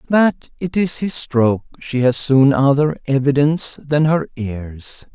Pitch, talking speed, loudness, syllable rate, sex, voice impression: 140 Hz, 150 wpm, -17 LUFS, 4.0 syllables/s, male, masculine, adult-like, tensed, bright, soft, slightly halting, cool, calm, friendly, reassuring, slightly wild, kind, slightly modest